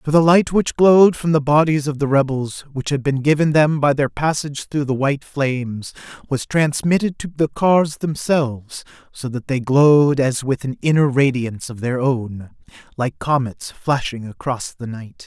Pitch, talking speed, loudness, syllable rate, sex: 140 Hz, 180 wpm, -18 LUFS, 4.7 syllables/s, male